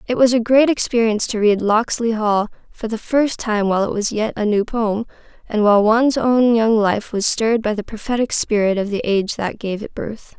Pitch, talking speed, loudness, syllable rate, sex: 220 Hz, 225 wpm, -18 LUFS, 5.3 syllables/s, female